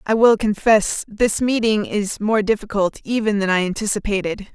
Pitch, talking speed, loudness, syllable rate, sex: 210 Hz, 160 wpm, -19 LUFS, 4.9 syllables/s, female